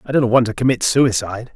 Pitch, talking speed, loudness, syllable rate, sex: 120 Hz, 270 wpm, -16 LUFS, 6.9 syllables/s, male